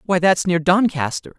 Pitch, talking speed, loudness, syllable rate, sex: 175 Hz, 175 wpm, -18 LUFS, 4.8 syllables/s, male